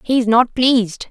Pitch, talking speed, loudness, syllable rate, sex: 240 Hz, 165 wpm, -15 LUFS, 4.0 syllables/s, female